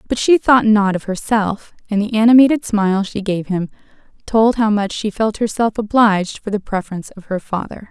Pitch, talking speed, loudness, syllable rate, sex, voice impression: 210 Hz, 195 wpm, -16 LUFS, 5.5 syllables/s, female, feminine, slightly adult-like, slightly intellectual, slightly elegant